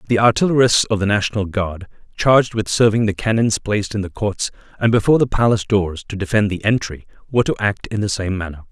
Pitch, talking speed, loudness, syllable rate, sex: 105 Hz, 215 wpm, -18 LUFS, 6.3 syllables/s, male